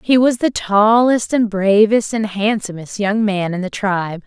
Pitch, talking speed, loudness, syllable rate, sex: 210 Hz, 185 wpm, -16 LUFS, 4.3 syllables/s, female